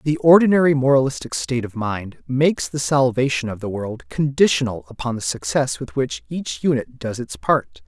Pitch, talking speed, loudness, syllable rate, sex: 130 Hz, 175 wpm, -20 LUFS, 5.1 syllables/s, male